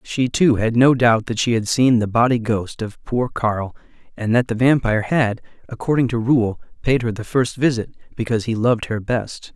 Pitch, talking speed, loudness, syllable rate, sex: 115 Hz, 205 wpm, -19 LUFS, 5.0 syllables/s, male